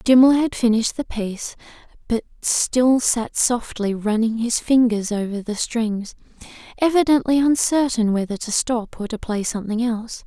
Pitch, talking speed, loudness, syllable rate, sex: 235 Hz, 145 wpm, -20 LUFS, 4.7 syllables/s, female